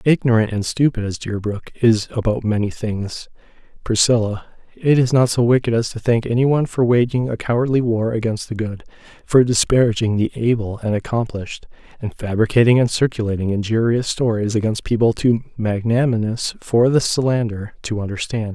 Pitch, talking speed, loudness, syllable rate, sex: 115 Hz, 160 wpm, -19 LUFS, 5.4 syllables/s, male